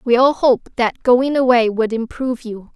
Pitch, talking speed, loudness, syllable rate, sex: 240 Hz, 195 wpm, -16 LUFS, 4.9 syllables/s, female